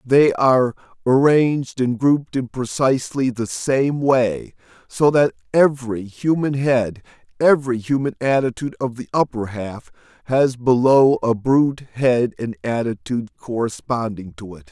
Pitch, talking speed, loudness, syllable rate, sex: 125 Hz, 130 wpm, -19 LUFS, 4.6 syllables/s, male